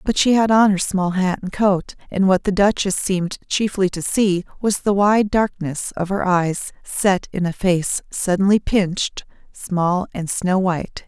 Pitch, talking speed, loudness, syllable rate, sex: 190 Hz, 185 wpm, -19 LUFS, 4.2 syllables/s, female